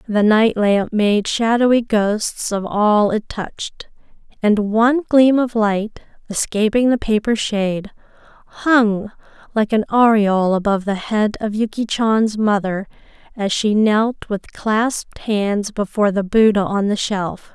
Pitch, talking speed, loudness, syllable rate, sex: 215 Hz, 145 wpm, -17 LUFS, 4.0 syllables/s, female